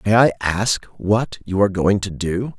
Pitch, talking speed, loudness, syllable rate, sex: 100 Hz, 210 wpm, -19 LUFS, 4.4 syllables/s, male